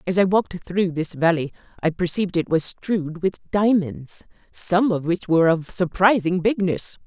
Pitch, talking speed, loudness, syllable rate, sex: 180 Hz, 170 wpm, -21 LUFS, 4.8 syllables/s, female